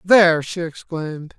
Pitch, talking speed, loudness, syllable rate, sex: 170 Hz, 130 wpm, -19 LUFS, 4.7 syllables/s, male